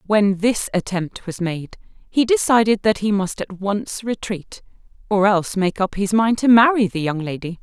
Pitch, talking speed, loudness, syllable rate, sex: 200 Hz, 180 wpm, -19 LUFS, 4.6 syllables/s, female